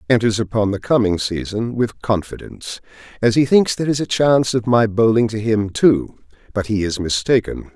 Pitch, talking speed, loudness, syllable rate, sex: 110 Hz, 185 wpm, -18 LUFS, 5.3 syllables/s, male